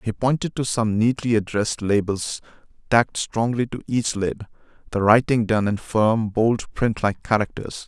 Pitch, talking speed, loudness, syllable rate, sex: 110 Hz, 150 wpm, -22 LUFS, 4.6 syllables/s, male